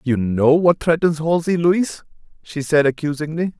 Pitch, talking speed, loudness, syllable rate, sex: 155 Hz, 150 wpm, -18 LUFS, 4.8 syllables/s, male